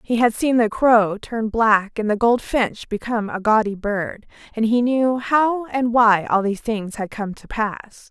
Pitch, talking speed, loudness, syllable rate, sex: 225 Hz, 200 wpm, -19 LUFS, 4.2 syllables/s, female